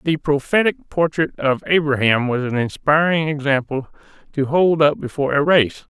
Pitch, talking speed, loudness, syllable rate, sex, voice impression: 145 Hz, 150 wpm, -18 LUFS, 4.9 syllables/s, male, very masculine, slightly middle-aged, slightly muffled, unique